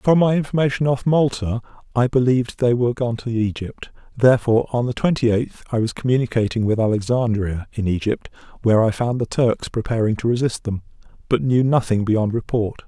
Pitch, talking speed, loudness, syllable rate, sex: 115 Hz, 175 wpm, -20 LUFS, 5.7 syllables/s, male